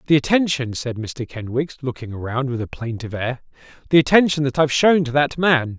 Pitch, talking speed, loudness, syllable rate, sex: 135 Hz, 195 wpm, -20 LUFS, 5.7 syllables/s, male